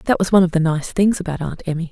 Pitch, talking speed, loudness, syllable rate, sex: 175 Hz, 315 wpm, -18 LUFS, 7.0 syllables/s, female